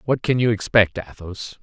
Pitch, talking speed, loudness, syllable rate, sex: 110 Hz, 185 wpm, -19 LUFS, 4.7 syllables/s, male